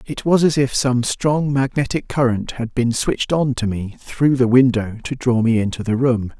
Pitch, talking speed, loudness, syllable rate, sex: 125 Hz, 215 wpm, -18 LUFS, 4.7 syllables/s, male